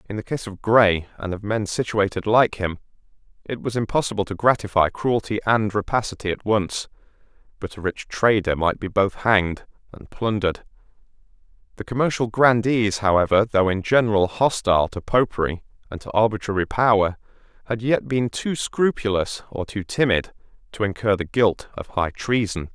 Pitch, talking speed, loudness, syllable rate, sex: 105 Hz, 160 wpm, -21 LUFS, 5.2 syllables/s, male